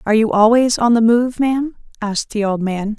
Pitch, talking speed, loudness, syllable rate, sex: 225 Hz, 220 wpm, -16 LUFS, 5.6 syllables/s, female